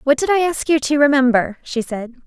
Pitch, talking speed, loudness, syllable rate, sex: 270 Hz, 240 wpm, -17 LUFS, 5.4 syllables/s, female